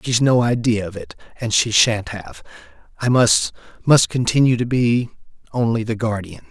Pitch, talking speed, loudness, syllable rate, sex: 115 Hz, 140 wpm, -18 LUFS, 4.7 syllables/s, male